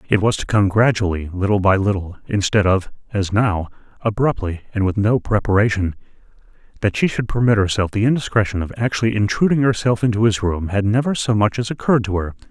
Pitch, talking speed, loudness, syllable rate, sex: 105 Hz, 185 wpm, -19 LUFS, 5.9 syllables/s, male